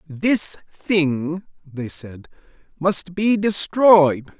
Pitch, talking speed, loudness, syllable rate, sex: 170 Hz, 95 wpm, -18 LUFS, 2.3 syllables/s, male